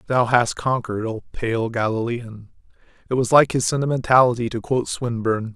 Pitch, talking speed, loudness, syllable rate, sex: 120 Hz, 150 wpm, -21 LUFS, 5.6 syllables/s, male